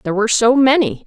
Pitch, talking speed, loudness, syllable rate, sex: 235 Hz, 225 wpm, -14 LUFS, 7.2 syllables/s, female